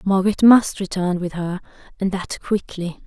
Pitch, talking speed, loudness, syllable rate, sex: 190 Hz, 155 wpm, -20 LUFS, 4.9 syllables/s, female